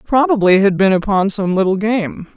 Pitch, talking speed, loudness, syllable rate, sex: 200 Hz, 180 wpm, -14 LUFS, 5.1 syllables/s, female